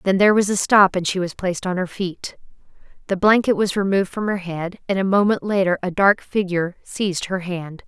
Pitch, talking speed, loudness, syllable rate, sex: 190 Hz, 220 wpm, -20 LUFS, 5.7 syllables/s, female